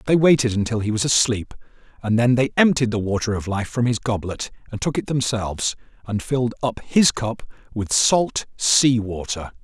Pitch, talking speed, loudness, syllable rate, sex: 115 Hz, 185 wpm, -21 LUFS, 4.9 syllables/s, male